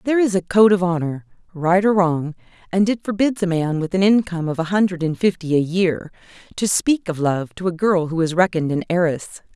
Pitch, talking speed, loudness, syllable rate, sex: 180 Hz, 225 wpm, -19 LUFS, 5.6 syllables/s, female